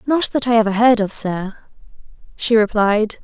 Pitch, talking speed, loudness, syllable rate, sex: 220 Hz, 165 wpm, -17 LUFS, 4.6 syllables/s, female